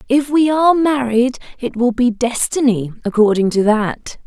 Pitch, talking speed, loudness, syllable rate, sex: 245 Hz, 155 wpm, -16 LUFS, 4.7 syllables/s, female